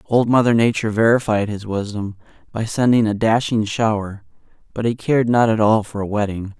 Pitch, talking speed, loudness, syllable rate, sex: 110 Hz, 180 wpm, -18 LUFS, 5.5 syllables/s, male